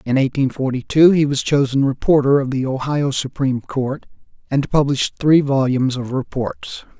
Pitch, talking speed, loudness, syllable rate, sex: 135 Hz, 165 wpm, -18 LUFS, 5.3 syllables/s, male